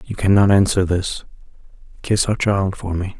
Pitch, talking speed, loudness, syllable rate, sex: 95 Hz, 170 wpm, -18 LUFS, 4.7 syllables/s, male